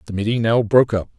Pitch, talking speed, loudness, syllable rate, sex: 110 Hz, 255 wpm, -18 LUFS, 7.1 syllables/s, male